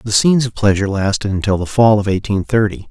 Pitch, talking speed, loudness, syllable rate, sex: 105 Hz, 225 wpm, -15 LUFS, 6.5 syllables/s, male